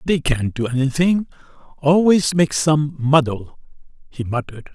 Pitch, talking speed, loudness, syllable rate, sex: 145 Hz, 125 wpm, -18 LUFS, 4.5 syllables/s, male